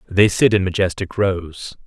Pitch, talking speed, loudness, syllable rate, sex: 95 Hz, 160 wpm, -18 LUFS, 4.3 syllables/s, male